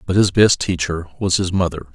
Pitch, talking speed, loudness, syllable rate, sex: 90 Hz, 215 wpm, -18 LUFS, 5.6 syllables/s, male